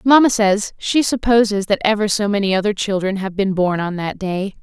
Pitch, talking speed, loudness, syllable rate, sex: 205 Hz, 210 wpm, -17 LUFS, 5.2 syllables/s, female